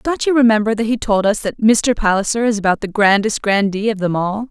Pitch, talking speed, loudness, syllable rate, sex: 215 Hz, 240 wpm, -16 LUFS, 5.6 syllables/s, female